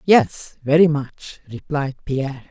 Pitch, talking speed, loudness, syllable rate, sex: 140 Hz, 120 wpm, -19 LUFS, 3.8 syllables/s, female